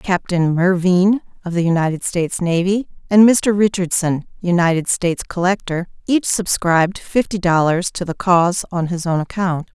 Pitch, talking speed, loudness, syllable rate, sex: 180 Hz, 145 wpm, -17 LUFS, 4.9 syllables/s, female